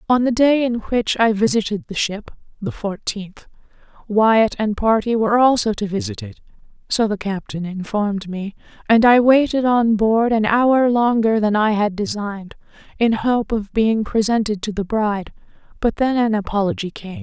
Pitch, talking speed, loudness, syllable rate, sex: 220 Hz, 165 wpm, -18 LUFS, 4.8 syllables/s, female